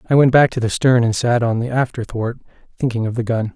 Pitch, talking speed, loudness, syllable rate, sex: 120 Hz, 270 wpm, -17 LUFS, 5.9 syllables/s, male